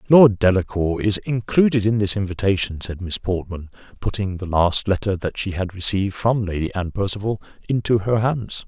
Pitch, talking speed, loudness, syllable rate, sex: 100 Hz, 175 wpm, -21 LUFS, 5.3 syllables/s, male